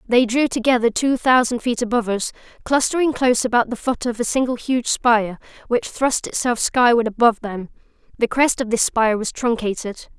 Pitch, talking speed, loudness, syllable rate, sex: 240 Hz, 185 wpm, -19 LUFS, 5.5 syllables/s, female